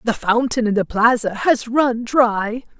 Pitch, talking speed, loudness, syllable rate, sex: 230 Hz, 170 wpm, -18 LUFS, 4.0 syllables/s, female